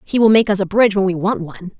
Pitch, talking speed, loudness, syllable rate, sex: 200 Hz, 335 wpm, -15 LUFS, 7.2 syllables/s, female